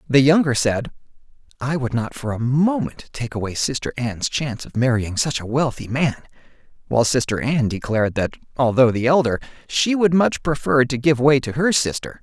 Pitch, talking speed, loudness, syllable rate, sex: 130 Hz, 185 wpm, -20 LUFS, 5.4 syllables/s, male